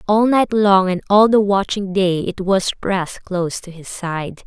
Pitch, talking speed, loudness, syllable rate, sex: 190 Hz, 200 wpm, -17 LUFS, 4.4 syllables/s, female